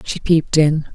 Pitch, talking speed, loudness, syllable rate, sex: 155 Hz, 190 wpm, -16 LUFS, 4.9 syllables/s, female